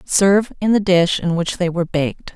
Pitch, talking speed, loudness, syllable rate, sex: 180 Hz, 230 wpm, -17 LUFS, 5.5 syllables/s, female